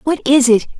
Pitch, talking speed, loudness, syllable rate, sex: 265 Hz, 225 wpm, -13 LUFS, 5.0 syllables/s, female